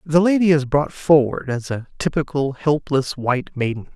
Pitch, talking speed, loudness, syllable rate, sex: 145 Hz, 165 wpm, -20 LUFS, 4.9 syllables/s, male